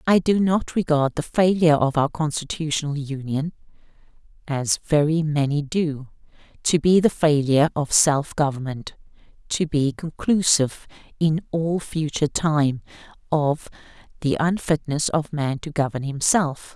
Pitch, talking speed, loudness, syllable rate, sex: 155 Hz, 125 wpm, -22 LUFS, 4.5 syllables/s, female